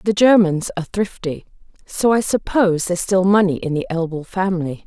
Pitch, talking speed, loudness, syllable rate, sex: 185 Hz, 175 wpm, -18 LUFS, 5.4 syllables/s, female